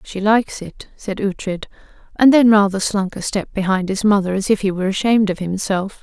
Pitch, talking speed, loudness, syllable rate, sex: 200 Hz, 210 wpm, -17 LUFS, 5.5 syllables/s, female